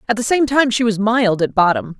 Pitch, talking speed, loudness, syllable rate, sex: 220 Hz, 270 wpm, -16 LUFS, 5.5 syllables/s, female